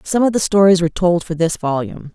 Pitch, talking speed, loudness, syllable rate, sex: 175 Hz, 250 wpm, -16 LUFS, 6.3 syllables/s, female